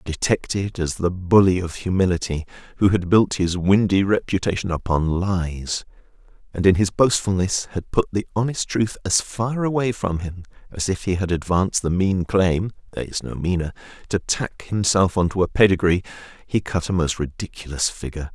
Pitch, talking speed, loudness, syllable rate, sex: 95 Hz, 175 wpm, -21 LUFS, 4.9 syllables/s, male